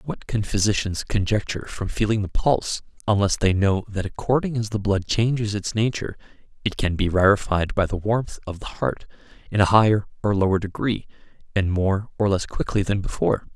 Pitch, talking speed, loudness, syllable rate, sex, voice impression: 105 Hz, 190 wpm, -23 LUFS, 5.6 syllables/s, male, masculine, adult-like, cool, intellectual